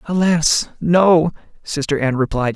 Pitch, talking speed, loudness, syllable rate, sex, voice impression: 155 Hz, 120 wpm, -17 LUFS, 4.3 syllables/s, male, masculine, adult-like, tensed, powerful, bright, clear, slightly nasal, intellectual, friendly, unique, lively, slightly intense